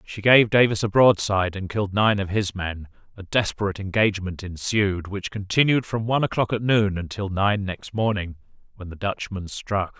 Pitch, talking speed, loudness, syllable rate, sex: 100 Hz, 180 wpm, -22 LUFS, 5.2 syllables/s, male